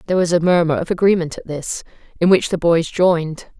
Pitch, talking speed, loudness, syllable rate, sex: 170 Hz, 215 wpm, -17 LUFS, 6.0 syllables/s, female